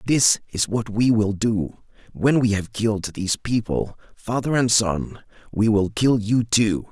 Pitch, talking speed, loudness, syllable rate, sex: 110 Hz, 175 wpm, -21 LUFS, 4.1 syllables/s, male